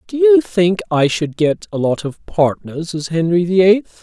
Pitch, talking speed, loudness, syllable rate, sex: 180 Hz, 210 wpm, -16 LUFS, 4.3 syllables/s, male